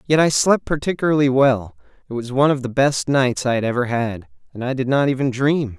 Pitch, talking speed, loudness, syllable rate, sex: 130 Hz, 230 wpm, -19 LUFS, 5.7 syllables/s, male